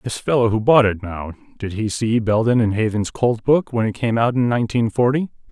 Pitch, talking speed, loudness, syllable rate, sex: 115 Hz, 230 wpm, -19 LUFS, 5.4 syllables/s, male